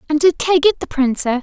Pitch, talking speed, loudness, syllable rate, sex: 305 Hz, 255 wpm, -16 LUFS, 5.4 syllables/s, female